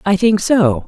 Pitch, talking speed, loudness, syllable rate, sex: 200 Hz, 205 wpm, -14 LUFS, 3.9 syllables/s, female